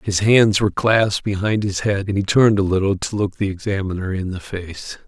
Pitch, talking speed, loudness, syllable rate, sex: 100 Hz, 225 wpm, -19 LUFS, 5.5 syllables/s, male